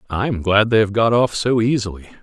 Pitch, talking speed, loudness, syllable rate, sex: 110 Hz, 245 wpm, -17 LUFS, 6.0 syllables/s, male